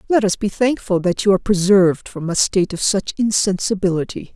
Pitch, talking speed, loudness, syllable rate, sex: 195 Hz, 195 wpm, -18 LUFS, 5.8 syllables/s, female